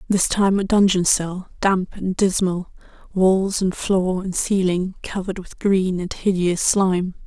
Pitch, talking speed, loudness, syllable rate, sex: 185 Hz, 155 wpm, -20 LUFS, 4.1 syllables/s, female